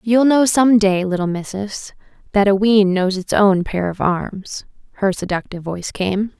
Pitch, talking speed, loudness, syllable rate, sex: 200 Hz, 180 wpm, -17 LUFS, 4.5 syllables/s, female